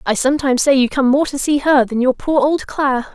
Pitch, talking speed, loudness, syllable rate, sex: 270 Hz, 265 wpm, -15 LUFS, 5.9 syllables/s, female